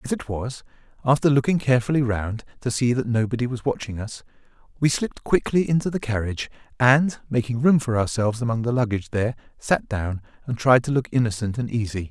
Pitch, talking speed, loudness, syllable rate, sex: 120 Hz, 190 wpm, -23 LUFS, 6.1 syllables/s, male